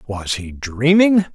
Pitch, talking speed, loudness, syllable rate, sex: 135 Hz, 135 wpm, -16 LUFS, 3.6 syllables/s, male